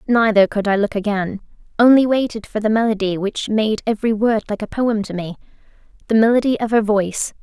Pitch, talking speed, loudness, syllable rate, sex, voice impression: 215 Hz, 195 wpm, -18 LUFS, 5.8 syllables/s, female, feminine, slightly young, tensed, powerful, hard, clear, fluent, cute, slightly friendly, unique, slightly sweet, lively, slightly sharp